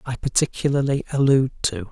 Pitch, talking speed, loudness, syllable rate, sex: 135 Hz, 125 wpm, -21 LUFS, 5.9 syllables/s, male